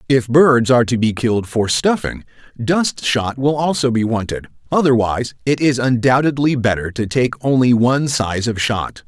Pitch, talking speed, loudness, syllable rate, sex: 125 Hz, 170 wpm, -16 LUFS, 4.9 syllables/s, male